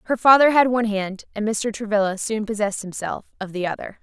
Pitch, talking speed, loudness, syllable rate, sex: 215 Hz, 210 wpm, -21 LUFS, 6.0 syllables/s, female